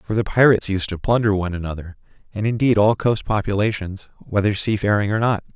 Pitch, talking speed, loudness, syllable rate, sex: 105 Hz, 185 wpm, -20 LUFS, 6.0 syllables/s, male